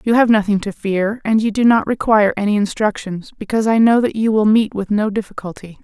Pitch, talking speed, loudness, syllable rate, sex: 210 Hz, 225 wpm, -16 LUFS, 5.9 syllables/s, female